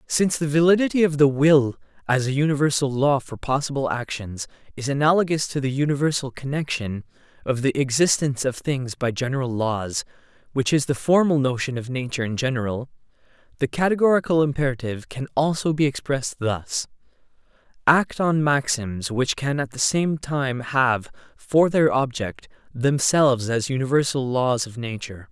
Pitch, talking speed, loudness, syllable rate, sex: 135 Hz, 150 wpm, -22 LUFS, 5.2 syllables/s, male